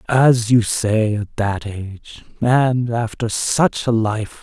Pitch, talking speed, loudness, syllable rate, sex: 115 Hz, 150 wpm, -18 LUFS, 3.2 syllables/s, male